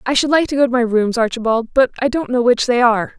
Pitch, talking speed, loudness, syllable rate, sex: 245 Hz, 300 wpm, -16 LUFS, 6.5 syllables/s, female